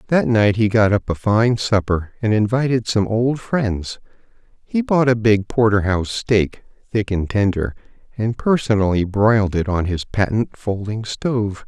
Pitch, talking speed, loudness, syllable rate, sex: 110 Hz, 160 wpm, -19 LUFS, 4.5 syllables/s, male